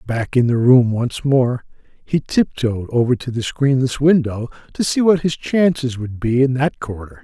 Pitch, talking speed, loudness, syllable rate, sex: 130 Hz, 190 wpm, -17 LUFS, 4.5 syllables/s, male